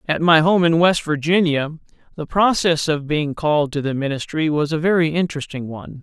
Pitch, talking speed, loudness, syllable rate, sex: 155 Hz, 190 wpm, -18 LUFS, 5.5 syllables/s, male